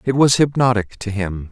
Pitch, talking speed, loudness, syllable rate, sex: 115 Hz, 200 wpm, -17 LUFS, 5.0 syllables/s, male